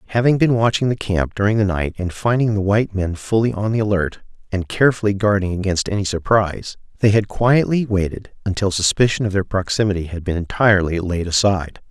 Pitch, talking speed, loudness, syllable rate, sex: 100 Hz, 185 wpm, -18 LUFS, 5.9 syllables/s, male